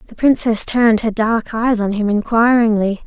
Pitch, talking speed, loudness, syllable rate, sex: 225 Hz, 175 wpm, -15 LUFS, 4.9 syllables/s, female